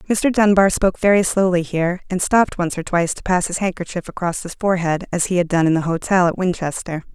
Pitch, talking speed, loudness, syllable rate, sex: 180 Hz, 225 wpm, -18 LUFS, 6.1 syllables/s, female